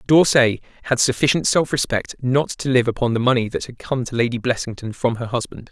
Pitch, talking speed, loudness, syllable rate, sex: 125 Hz, 210 wpm, -20 LUFS, 5.7 syllables/s, male